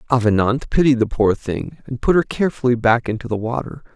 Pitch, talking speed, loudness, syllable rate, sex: 120 Hz, 195 wpm, -19 LUFS, 5.9 syllables/s, male